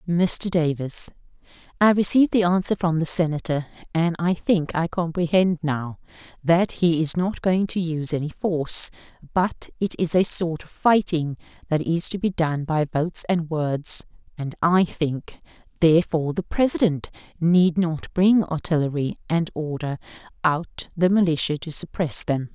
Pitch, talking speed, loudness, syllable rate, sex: 165 Hz, 155 wpm, -22 LUFS, 4.5 syllables/s, female